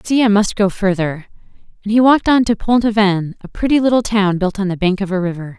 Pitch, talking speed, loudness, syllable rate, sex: 205 Hz, 260 wpm, -15 LUFS, 6.1 syllables/s, female